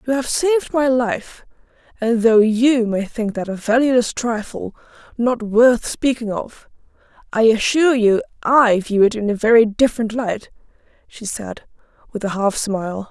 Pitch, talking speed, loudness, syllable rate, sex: 230 Hz, 160 wpm, -18 LUFS, 4.5 syllables/s, female